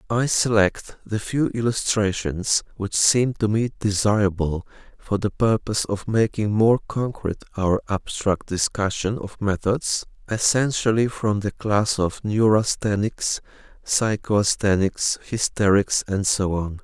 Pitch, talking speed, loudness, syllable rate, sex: 105 Hz, 120 wpm, -22 LUFS, 4.1 syllables/s, male